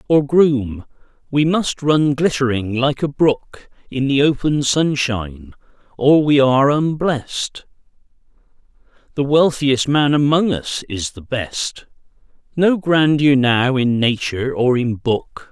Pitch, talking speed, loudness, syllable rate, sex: 135 Hz, 125 wpm, -17 LUFS, 3.7 syllables/s, male